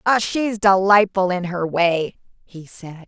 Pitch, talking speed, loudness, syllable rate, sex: 190 Hz, 135 wpm, -18 LUFS, 3.8 syllables/s, female